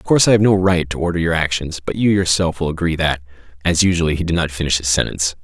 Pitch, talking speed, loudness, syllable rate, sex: 85 Hz, 265 wpm, -17 LUFS, 6.7 syllables/s, male